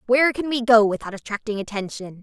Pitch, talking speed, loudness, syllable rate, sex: 225 Hz, 190 wpm, -21 LUFS, 6.3 syllables/s, female